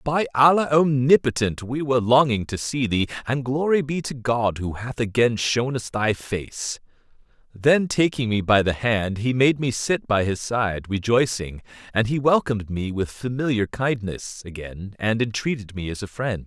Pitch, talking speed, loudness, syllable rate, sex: 120 Hz, 180 wpm, -22 LUFS, 4.6 syllables/s, male